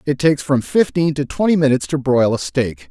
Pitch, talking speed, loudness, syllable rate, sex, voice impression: 140 Hz, 225 wpm, -17 LUFS, 5.7 syllables/s, male, masculine, adult-like, thick, tensed, powerful, fluent, intellectual, slightly mature, slightly unique, lively, slightly intense